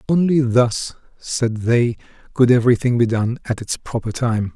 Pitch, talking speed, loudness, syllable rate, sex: 120 Hz, 160 wpm, -18 LUFS, 4.6 syllables/s, male